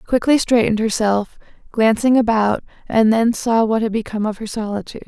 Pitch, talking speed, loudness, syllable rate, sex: 220 Hz, 175 wpm, -18 LUFS, 6.2 syllables/s, female